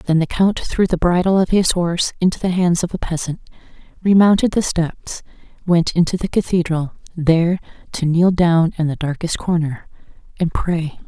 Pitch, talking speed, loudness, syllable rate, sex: 170 Hz, 175 wpm, -18 LUFS, 5.0 syllables/s, female